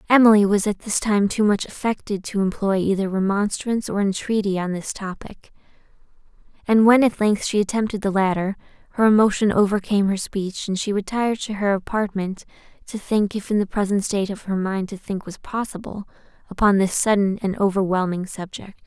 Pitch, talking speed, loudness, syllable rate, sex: 200 Hz, 180 wpm, -21 LUFS, 5.5 syllables/s, female